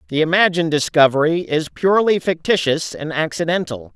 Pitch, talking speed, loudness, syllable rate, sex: 160 Hz, 120 wpm, -17 LUFS, 5.6 syllables/s, male